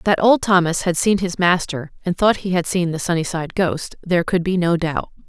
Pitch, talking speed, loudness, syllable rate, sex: 180 Hz, 225 wpm, -19 LUFS, 5.3 syllables/s, female